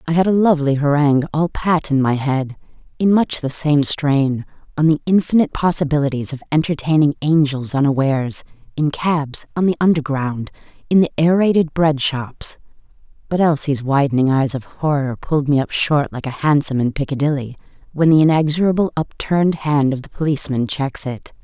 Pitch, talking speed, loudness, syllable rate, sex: 150 Hz, 160 wpm, -17 LUFS, 5.4 syllables/s, female